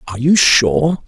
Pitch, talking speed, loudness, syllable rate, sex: 130 Hz, 165 wpm, -12 LUFS, 4.4 syllables/s, male